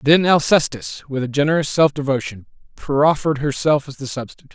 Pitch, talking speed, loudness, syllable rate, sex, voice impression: 145 Hz, 160 wpm, -18 LUFS, 5.8 syllables/s, male, masculine, adult-like, tensed, powerful, bright, clear, nasal, cool, intellectual, wild, lively, intense